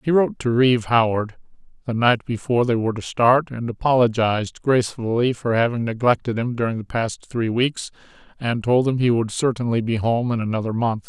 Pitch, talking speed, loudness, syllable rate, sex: 120 Hz, 190 wpm, -21 LUFS, 5.6 syllables/s, male